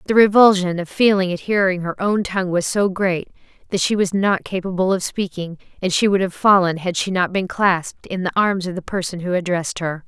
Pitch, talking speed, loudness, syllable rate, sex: 185 Hz, 225 wpm, -19 LUFS, 5.6 syllables/s, female